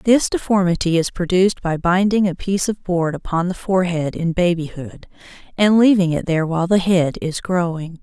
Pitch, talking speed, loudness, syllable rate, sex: 180 Hz, 180 wpm, -18 LUFS, 5.4 syllables/s, female